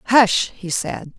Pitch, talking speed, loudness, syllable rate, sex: 200 Hz, 150 wpm, -19 LUFS, 3.3 syllables/s, female